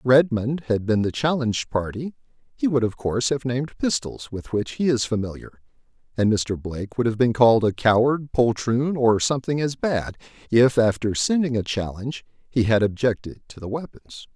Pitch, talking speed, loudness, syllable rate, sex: 120 Hz, 180 wpm, -22 LUFS, 5.1 syllables/s, male